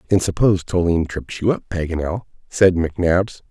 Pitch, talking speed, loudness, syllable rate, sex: 90 Hz, 155 wpm, -19 LUFS, 5.9 syllables/s, male